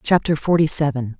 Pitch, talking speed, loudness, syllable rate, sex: 145 Hz, 150 wpm, -19 LUFS, 5.5 syllables/s, female